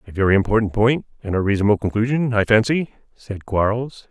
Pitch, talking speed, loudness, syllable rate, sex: 110 Hz, 175 wpm, -19 LUFS, 6.1 syllables/s, male